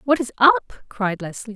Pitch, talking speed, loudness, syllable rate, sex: 220 Hz, 195 wpm, -19 LUFS, 4.3 syllables/s, female